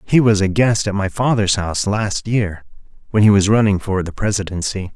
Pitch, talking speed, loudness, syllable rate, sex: 100 Hz, 205 wpm, -17 LUFS, 5.3 syllables/s, male